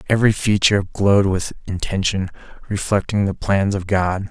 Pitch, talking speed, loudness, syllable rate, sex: 100 Hz, 140 wpm, -19 LUFS, 5.2 syllables/s, male